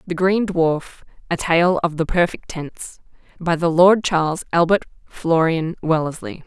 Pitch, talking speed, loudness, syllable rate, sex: 170 Hz, 150 wpm, -19 LUFS, 4.5 syllables/s, female